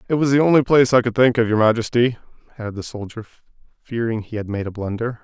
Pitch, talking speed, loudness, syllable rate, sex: 115 Hz, 230 wpm, -19 LUFS, 6.9 syllables/s, male